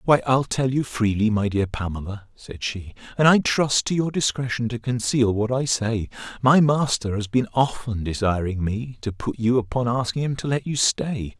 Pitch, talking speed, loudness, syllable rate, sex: 120 Hz, 200 wpm, -22 LUFS, 4.8 syllables/s, male